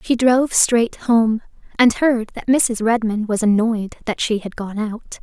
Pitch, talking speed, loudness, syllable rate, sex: 225 Hz, 185 wpm, -18 LUFS, 4.1 syllables/s, female